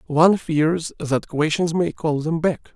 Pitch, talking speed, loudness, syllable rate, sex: 160 Hz, 175 wpm, -21 LUFS, 4.0 syllables/s, male